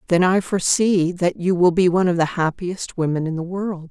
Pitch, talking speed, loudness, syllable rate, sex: 180 Hz, 230 wpm, -19 LUFS, 5.4 syllables/s, female